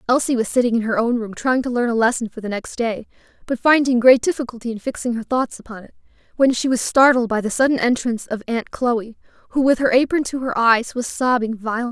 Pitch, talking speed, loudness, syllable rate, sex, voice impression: 240 Hz, 235 wpm, -19 LUFS, 6.0 syllables/s, female, feminine, adult-like, slightly intellectual, slightly strict